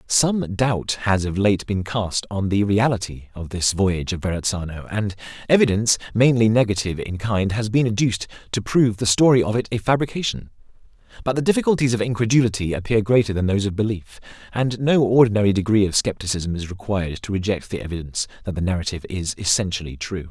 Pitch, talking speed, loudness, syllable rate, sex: 105 Hz, 180 wpm, -21 LUFS, 6.1 syllables/s, male